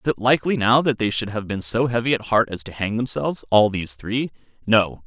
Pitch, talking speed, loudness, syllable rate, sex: 110 Hz, 250 wpm, -21 LUFS, 5.9 syllables/s, male